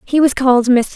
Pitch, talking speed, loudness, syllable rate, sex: 260 Hz, 250 wpm, -13 LUFS, 5.6 syllables/s, female